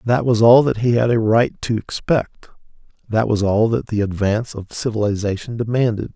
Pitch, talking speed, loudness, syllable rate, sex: 115 Hz, 185 wpm, -18 LUFS, 5.1 syllables/s, male